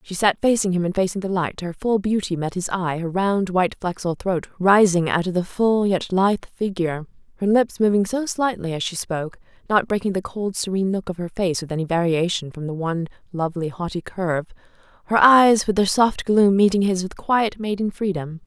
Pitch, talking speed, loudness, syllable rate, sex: 190 Hz, 210 wpm, -21 LUFS, 5.6 syllables/s, female